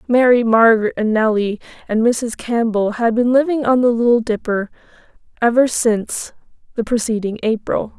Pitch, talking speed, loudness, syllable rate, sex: 230 Hz, 145 wpm, -17 LUFS, 5.1 syllables/s, female